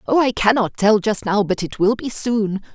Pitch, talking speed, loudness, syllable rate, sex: 215 Hz, 240 wpm, -18 LUFS, 4.8 syllables/s, female